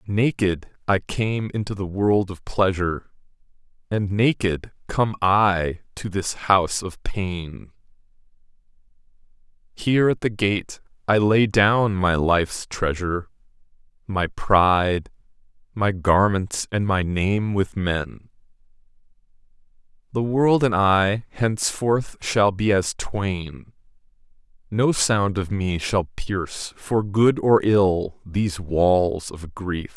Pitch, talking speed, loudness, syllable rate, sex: 100 Hz, 120 wpm, -22 LUFS, 3.5 syllables/s, male